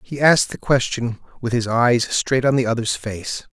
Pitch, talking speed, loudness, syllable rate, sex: 120 Hz, 205 wpm, -19 LUFS, 4.7 syllables/s, male